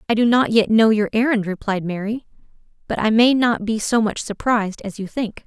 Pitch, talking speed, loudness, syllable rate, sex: 220 Hz, 220 wpm, -19 LUFS, 5.4 syllables/s, female